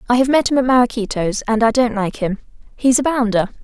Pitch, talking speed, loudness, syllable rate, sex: 235 Hz, 230 wpm, -17 LUFS, 6.0 syllables/s, female